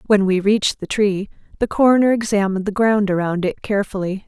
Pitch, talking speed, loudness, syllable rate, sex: 205 Hz, 180 wpm, -18 LUFS, 6.1 syllables/s, female